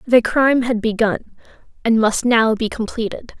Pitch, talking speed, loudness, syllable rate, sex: 230 Hz, 160 wpm, -18 LUFS, 4.8 syllables/s, female